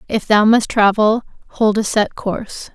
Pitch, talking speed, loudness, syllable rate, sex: 215 Hz, 175 wpm, -16 LUFS, 4.4 syllables/s, female